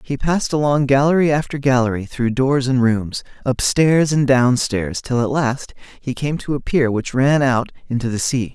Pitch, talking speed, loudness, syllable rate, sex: 130 Hz, 205 wpm, -18 LUFS, 4.7 syllables/s, male